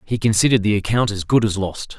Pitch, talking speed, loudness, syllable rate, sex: 105 Hz, 240 wpm, -18 LUFS, 6.4 syllables/s, male